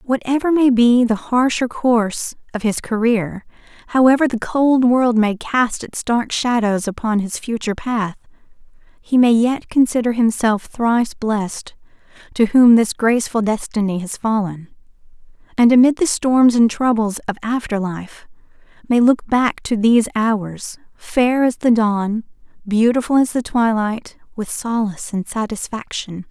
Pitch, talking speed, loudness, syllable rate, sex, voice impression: 230 Hz, 145 wpm, -17 LUFS, 4.4 syllables/s, female, very feminine, slightly young, slightly adult-like, very thin, relaxed, weak, bright, very soft, clear, slightly fluent, very cute, very intellectual, refreshing, very sincere, very calm, very friendly, very reassuring, unique, very elegant, very sweet, slightly lively, very kind, very modest, light